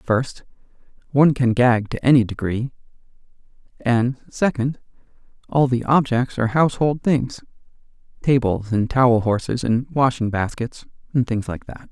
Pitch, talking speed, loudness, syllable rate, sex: 125 Hz, 125 wpm, -20 LUFS, 4.6 syllables/s, male